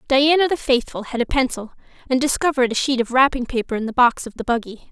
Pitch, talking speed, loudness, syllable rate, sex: 255 Hz, 230 wpm, -19 LUFS, 6.5 syllables/s, female